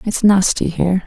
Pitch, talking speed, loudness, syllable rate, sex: 190 Hz, 170 wpm, -15 LUFS, 5.2 syllables/s, female